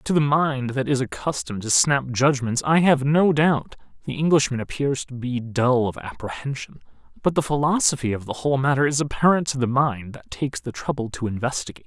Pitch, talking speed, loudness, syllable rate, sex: 135 Hz, 195 wpm, -22 LUFS, 5.6 syllables/s, male